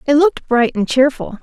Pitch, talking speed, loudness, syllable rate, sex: 270 Hz, 210 wpm, -15 LUFS, 5.6 syllables/s, female